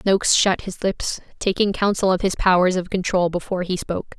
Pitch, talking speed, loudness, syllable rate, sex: 185 Hz, 200 wpm, -20 LUFS, 5.7 syllables/s, female